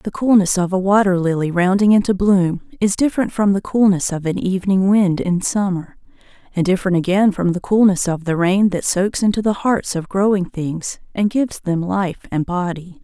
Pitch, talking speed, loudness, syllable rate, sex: 190 Hz, 200 wpm, -17 LUFS, 5.1 syllables/s, female